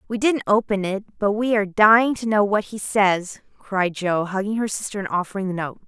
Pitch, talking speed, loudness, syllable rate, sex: 205 Hz, 225 wpm, -21 LUFS, 5.5 syllables/s, female